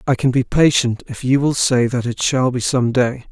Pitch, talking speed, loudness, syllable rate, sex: 125 Hz, 255 wpm, -17 LUFS, 4.8 syllables/s, male